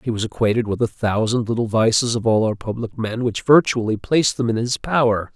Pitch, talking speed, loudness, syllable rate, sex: 115 Hz, 225 wpm, -19 LUFS, 5.7 syllables/s, male